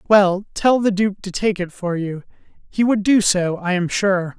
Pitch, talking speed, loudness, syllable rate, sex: 195 Hz, 220 wpm, -19 LUFS, 4.5 syllables/s, male